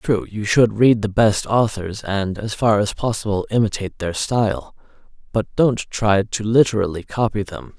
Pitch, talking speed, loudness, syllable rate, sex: 105 Hz, 170 wpm, -19 LUFS, 4.7 syllables/s, male